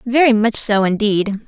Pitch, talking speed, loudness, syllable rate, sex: 220 Hz, 160 wpm, -15 LUFS, 4.7 syllables/s, female